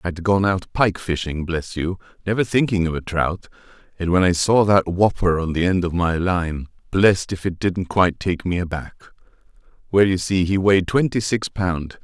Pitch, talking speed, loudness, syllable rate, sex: 90 Hz, 200 wpm, -20 LUFS, 4.8 syllables/s, male